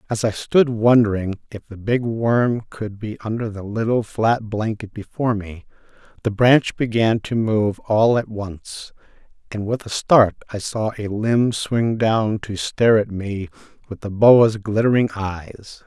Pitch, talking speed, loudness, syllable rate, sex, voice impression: 110 Hz, 165 wpm, -20 LUFS, 4.0 syllables/s, male, very masculine, slightly old, very thick, tensed, powerful, slightly bright, slightly soft, clear, slightly fluent, raspy, cool, very intellectual, refreshing, sincere, very calm, mature, friendly, reassuring, unique, slightly elegant, wild, sweet, lively, kind, slightly modest